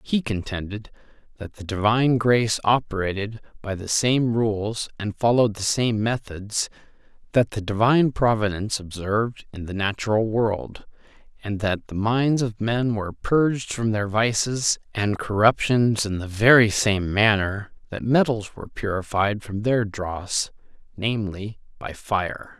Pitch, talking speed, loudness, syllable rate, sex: 110 Hz, 140 wpm, -23 LUFS, 4.4 syllables/s, male